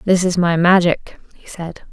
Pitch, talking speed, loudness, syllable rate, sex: 175 Hz, 190 wpm, -15 LUFS, 4.5 syllables/s, female